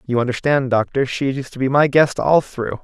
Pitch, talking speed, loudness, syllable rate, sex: 130 Hz, 235 wpm, -18 LUFS, 5.1 syllables/s, male